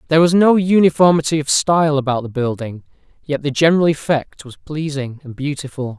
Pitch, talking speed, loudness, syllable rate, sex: 150 Hz, 170 wpm, -16 LUFS, 5.8 syllables/s, male